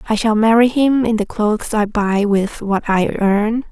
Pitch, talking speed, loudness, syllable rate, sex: 215 Hz, 210 wpm, -16 LUFS, 4.4 syllables/s, female